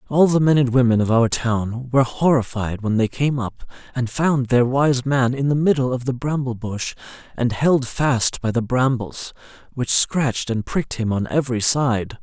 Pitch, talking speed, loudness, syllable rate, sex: 125 Hz, 195 wpm, -20 LUFS, 4.7 syllables/s, male